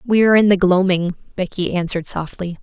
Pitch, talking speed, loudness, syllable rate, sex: 185 Hz, 185 wpm, -17 LUFS, 6.0 syllables/s, female